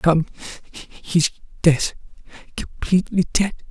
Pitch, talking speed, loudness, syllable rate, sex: 170 Hz, 80 wpm, -21 LUFS, 3.5 syllables/s, male